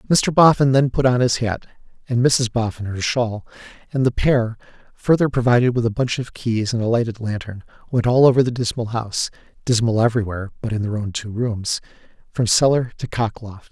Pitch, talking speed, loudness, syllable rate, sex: 120 Hz, 190 wpm, -19 LUFS, 5.5 syllables/s, male